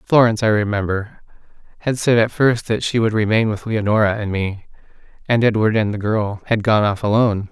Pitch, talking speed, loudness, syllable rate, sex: 110 Hz, 190 wpm, -18 LUFS, 5.5 syllables/s, male